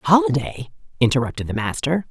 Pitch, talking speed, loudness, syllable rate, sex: 130 Hz, 115 wpm, -21 LUFS, 5.7 syllables/s, female